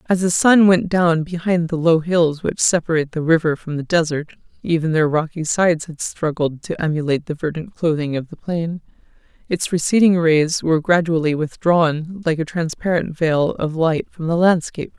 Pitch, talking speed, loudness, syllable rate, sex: 165 Hz, 170 wpm, -18 LUFS, 5.1 syllables/s, female